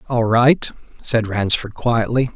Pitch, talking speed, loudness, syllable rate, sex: 115 Hz, 125 wpm, -18 LUFS, 3.8 syllables/s, male